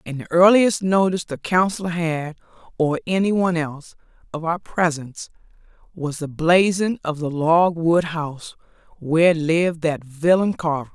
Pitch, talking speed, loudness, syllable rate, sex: 165 Hz, 150 wpm, -20 LUFS, 4.9 syllables/s, female